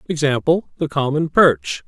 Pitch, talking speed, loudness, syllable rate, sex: 155 Hz, 130 wpm, -18 LUFS, 4.4 syllables/s, male